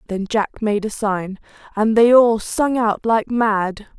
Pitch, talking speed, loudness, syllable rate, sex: 220 Hz, 180 wpm, -18 LUFS, 3.7 syllables/s, female